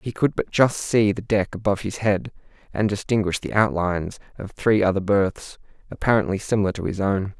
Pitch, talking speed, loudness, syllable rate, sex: 100 Hz, 185 wpm, -22 LUFS, 5.4 syllables/s, male